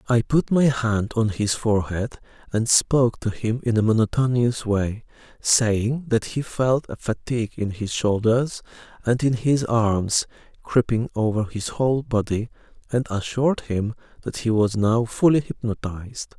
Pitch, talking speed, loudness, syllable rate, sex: 115 Hz, 155 wpm, -22 LUFS, 4.5 syllables/s, male